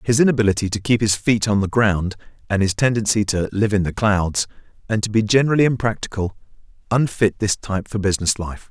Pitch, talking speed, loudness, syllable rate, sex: 105 Hz, 195 wpm, -19 LUFS, 6.0 syllables/s, male